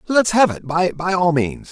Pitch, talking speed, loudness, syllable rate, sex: 175 Hz, 210 wpm, -18 LUFS, 3.9 syllables/s, male